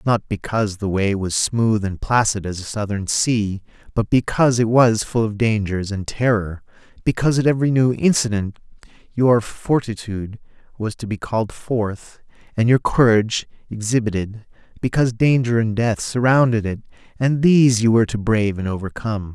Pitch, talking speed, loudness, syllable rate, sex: 110 Hz, 160 wpm, -19 LUFS, 5.2 syllables/s, male